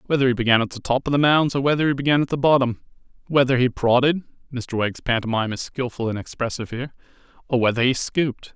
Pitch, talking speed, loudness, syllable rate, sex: 130 Hz, 215 wpm, -21 LUFS, 6.8 syllables/s, male